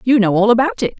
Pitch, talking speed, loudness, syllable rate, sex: 225 Hz, 300 wpm, -14 LUFS, 7.0 syllables/s, female